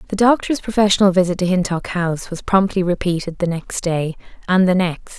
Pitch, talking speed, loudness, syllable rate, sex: 185 Hz, 185 wpm, -18 LUFS, 5.6 syllables/s, female